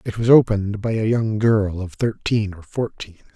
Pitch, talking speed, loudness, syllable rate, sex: 105 Hz, 195 wpm, -20 LUFS, 4.8 syllables/s, male